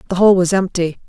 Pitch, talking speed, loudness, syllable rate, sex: 185 Hz, 220 wpm, -15 LUFS, 6.1 syllables/s, female